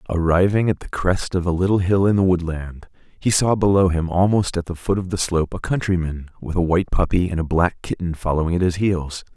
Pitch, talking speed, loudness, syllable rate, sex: 90 Hz, 230 wpm, -20 LUFS, 5.7 syllables/s, male